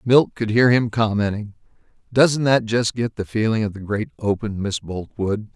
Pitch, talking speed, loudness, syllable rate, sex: 110 Hz, 185 wpm, -20 LUFS, 4.6 syllables/s, male